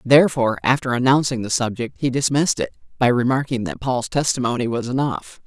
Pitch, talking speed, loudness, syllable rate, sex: 130 Hz, 165 wpm, -20 LUFS, 5.9 syllables/s, female